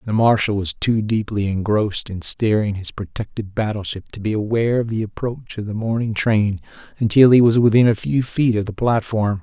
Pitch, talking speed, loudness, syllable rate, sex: 110 Hz, 195 wpm, -19 LUFS, 5.3 syllables/s, male